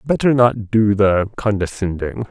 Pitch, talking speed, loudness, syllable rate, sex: 105 Hz, 130 wpm, -17 LUFS, 4.2 syllables/s, male